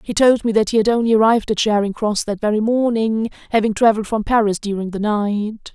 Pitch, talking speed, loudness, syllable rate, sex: 215 Hz, 220 wpm, -18 LUFS, 5.9 syllables/s, female